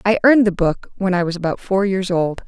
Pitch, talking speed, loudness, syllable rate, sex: 190 Hz, 265 wpm, -18 LUFS, 5.9 syllables/s, female